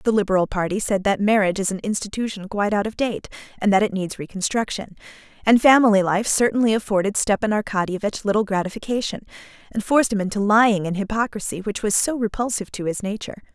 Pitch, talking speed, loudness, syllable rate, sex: 205 Hz, 180 wpm, -21 LUFS, 6.6 syllables/s, female